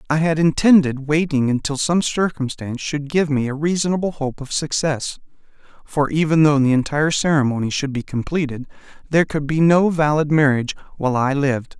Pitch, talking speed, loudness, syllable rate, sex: 150 Hz, 170 wpm, -19 LUFS, 5.7 syllables/s, male